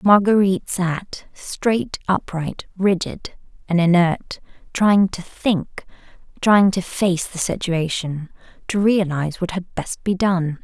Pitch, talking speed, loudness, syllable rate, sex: 185 Hz, 125 wpm, -20 LUFS, 3.6 syllables/s, female